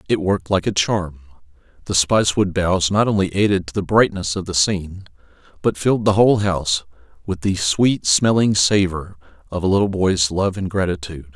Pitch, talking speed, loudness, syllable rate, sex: 90 Hz, 180 wpm, -18 LUFS, 5.5 syllables/s, male